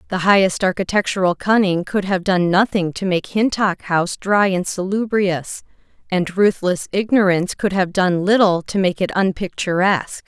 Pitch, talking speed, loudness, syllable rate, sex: 190 Hz, 150 wpm, -18 LUFS, 4.8 syllables/s, female